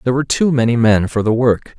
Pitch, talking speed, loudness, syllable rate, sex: 120 Hz, 270 wpm, -15 LUFS, 6.6 syllables/s, male